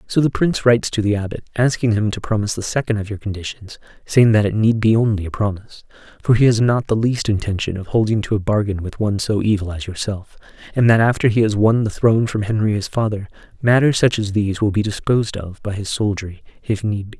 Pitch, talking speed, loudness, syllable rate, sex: 105 Hz, 235 wpm, -18 LUFS, 6.3 syllables/s, male